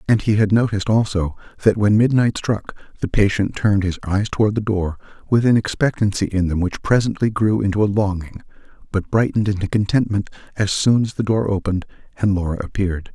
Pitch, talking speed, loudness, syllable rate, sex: 100 Hz, 185 wpm, -19 LUFS, 5.9 syllables/s, male